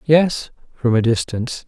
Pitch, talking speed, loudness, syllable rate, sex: 130 Hz, 145 wpm, -19 LUFS, 4.4 syllables/s, male